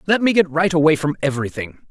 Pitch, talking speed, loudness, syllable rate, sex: 160 Hz, 220 wpm, -18 LUFS, 6.8 syllables/s, male